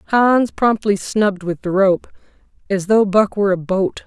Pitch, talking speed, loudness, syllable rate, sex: 200 Hz, 175 wpm, -17 LUFS, 4.4 syllables/s, female